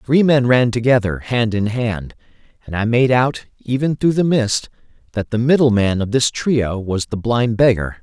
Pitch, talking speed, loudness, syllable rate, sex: 120 Hz, 195 wpm, -17 LUFS, 4.5 syllables/s, male